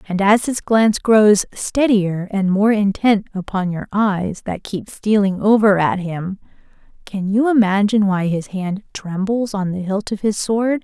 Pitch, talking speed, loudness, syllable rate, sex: 200 Hz, 170 wpm, -17 LUFS, 4.2 syllables/s, female